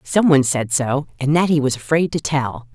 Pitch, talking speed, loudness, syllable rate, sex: 140 Hz, 240 wpm, -18 LUFS, 5.2 syllables/s, female